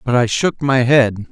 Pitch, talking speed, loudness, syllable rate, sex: 130 Hz, 230 wpm, -15 LUFS, 4.2 syllables/s, male